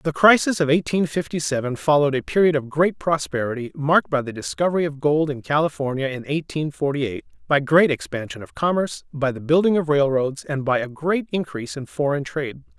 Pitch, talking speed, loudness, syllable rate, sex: 150 Hz, 195 wpm, -21 LUFS, 5.8 syllables/s, male